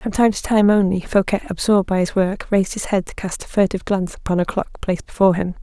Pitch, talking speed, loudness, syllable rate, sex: 195 Hz, 255 wpm, -19 LUFS, 6.7 syllables/s, female